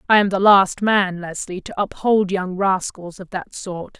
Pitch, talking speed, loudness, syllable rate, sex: 190 Hz, 195 wpm, -19 LUFS, 4.3 syllables/s, female